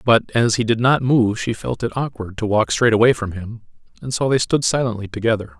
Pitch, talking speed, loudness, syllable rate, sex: 115 Hz, 235 wpm, -19 LUFS, 5.5 syllables/s, male